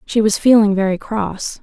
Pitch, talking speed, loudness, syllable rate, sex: 205 Hz, 185 wpm, -15 LUFS, 4.6 syllables/s, female